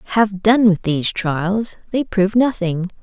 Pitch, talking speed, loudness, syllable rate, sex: 200 Hz, 160 wpm, -17 LUFS, 4.5 syllables/s, female